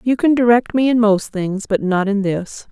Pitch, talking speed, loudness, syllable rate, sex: 215 Hz, 245 wpm, -16 LUFS, 4.7 syllables/s, female